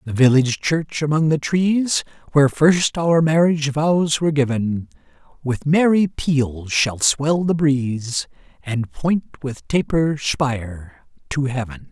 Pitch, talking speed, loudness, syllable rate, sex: 145 Hz, 135 wpm, -19 LUFS, 3.9 syllables/s, male